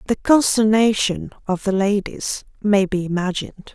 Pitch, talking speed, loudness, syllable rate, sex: 205 Hz, 130 wpm, -19 LUFS, 4.6 syllables/s, female